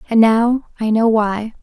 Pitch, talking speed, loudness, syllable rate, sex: 225 Hz, 185 wpm, -16 LUFS, 3.9 syllables/s, female